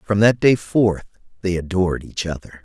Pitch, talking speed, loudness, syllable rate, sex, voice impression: 95 Hz, 180 wpm, -19 LUFS, 5.1 syllables/s, male, very masculine, adult-like, cool, slightly refreshing, sincere, slightly mature